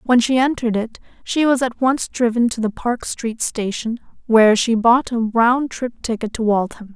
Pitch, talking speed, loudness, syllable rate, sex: 235 Hz, 200 wpm, -18 LUFS, 4.7 syllables/s, female